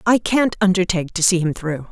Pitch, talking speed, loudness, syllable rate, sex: 185 Hz, 220 wpm, -18 LUFS, 5.7 syllables/s, female